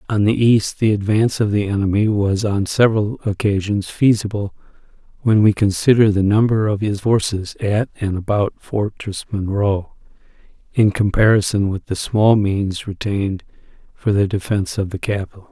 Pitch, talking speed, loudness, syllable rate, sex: 105 Hz, 150 wpm, -18 LUFS, 4.9 syllables/s, male